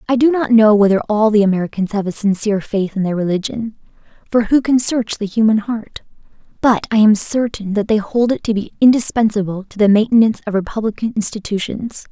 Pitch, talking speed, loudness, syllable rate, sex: 215 Hz, 195 wpm, -16 LUFS, 6.0 syllables/s, female